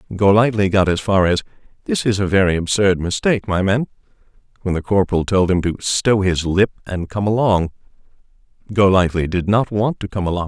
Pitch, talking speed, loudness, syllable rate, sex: 100 Hz, 180 wpm, -17 LUFS, 5.6 syllables/s, male